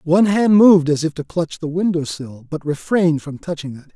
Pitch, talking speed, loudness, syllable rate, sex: 160 Hz, 230 wpm, -17 LUFS, 5.5 syllables/s, male